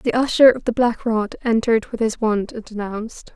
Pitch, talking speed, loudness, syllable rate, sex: 225 Hz, 215 wpm, -19 LUFS, 5.3 syllables/s, female